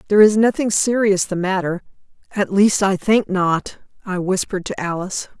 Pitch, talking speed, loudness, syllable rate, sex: 195 Hz, 155 wpm, -18 LUFS, 5.3 syllables/s, female